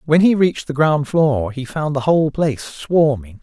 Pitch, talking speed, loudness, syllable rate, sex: 145 Hz, 210 wpm, -17 LUFS, 4.9 syllables/s, male